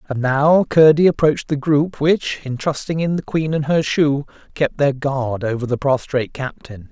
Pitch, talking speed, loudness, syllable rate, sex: 145 Hz, 190 wpm, -18 LUFS, 4.7 syllables/s, male